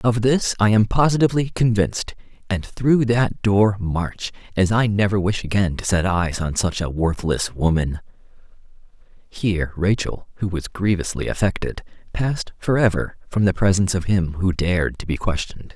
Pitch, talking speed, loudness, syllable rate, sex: 100 Hz, 165 wpm, -21 LUFS, 5.0 syllables/s, male